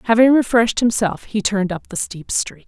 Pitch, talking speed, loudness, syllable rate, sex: 215 Hz, 200 wpm, -18 LUFS, 5.7 syllables/s, female